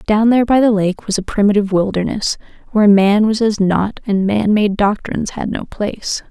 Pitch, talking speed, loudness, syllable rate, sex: 205 Hz, 190 wpm, -15 LUFS, 5.4 syllables/s, female